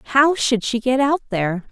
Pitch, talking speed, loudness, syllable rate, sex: 245 Hz, 210 wpm, -19 LUFS, 5.4 syllables/s, female